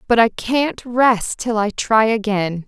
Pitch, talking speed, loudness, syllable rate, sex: 225 Hz, 180 wpm, -17 LUFS, 3.6 syllables/s, female